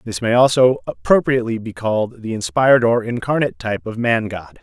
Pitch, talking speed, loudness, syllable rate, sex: 115 Hz, 180 wpm, -18 LUFS, 5.8 syllables/s, male